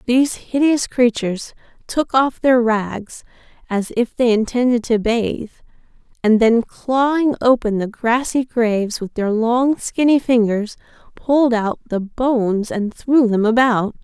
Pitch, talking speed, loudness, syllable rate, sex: 235 Hz, 140 wpm, -17 LUFS, 4.1 syllables/s, female